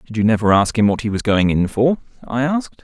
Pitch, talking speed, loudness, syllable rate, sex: 115 Hz, 275 wpm, -17 LUFS, 6.1 syllables/s, male